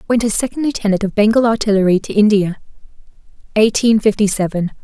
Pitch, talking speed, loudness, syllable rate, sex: 210 Hz, 150 wpm, -15 LUFS, 6.4 syllables/s, female